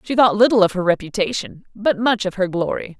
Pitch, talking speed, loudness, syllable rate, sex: 205 Hz, 220 wpm, -18 LUFS, 5.7 syllables/s, female